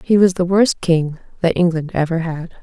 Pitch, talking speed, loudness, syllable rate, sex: 175 Hz, 205 wpm, -17 LUFS, 4.9 syllables/s, female